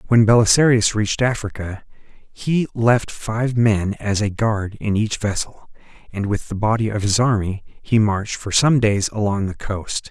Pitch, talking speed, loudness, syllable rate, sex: 110 Hz, 170 wpm, -19 LUFS, 4.4 syllables/s, male